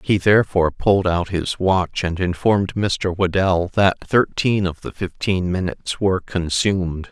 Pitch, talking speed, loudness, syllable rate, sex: 95 Hz, 150 wpm, -19 LUFS, 4.6 syllables/s, male